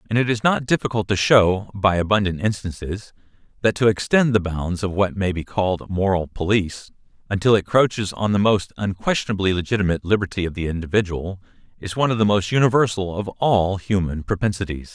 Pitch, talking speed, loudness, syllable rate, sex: 100 Hz, 175 wpm, -21 LUFS, 6.0 syllables/s, male